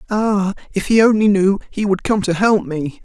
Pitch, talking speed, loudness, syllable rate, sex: 200 Hz, 215 wpm, -16 LUFS, 4.8 syllables/s, male